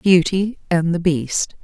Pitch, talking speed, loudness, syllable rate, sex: 175 Hz, 145 wpm, -19 LUFS, 3.5 syllables/s, female